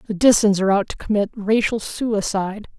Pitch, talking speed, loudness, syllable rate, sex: 205 Hz, 170 wpm, -19 LUFS, 5.5 syllables/s, female